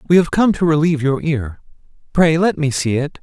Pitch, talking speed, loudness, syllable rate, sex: 155 Hz, 225 wpm, -16 LUFS, 5.7 syllables/s, male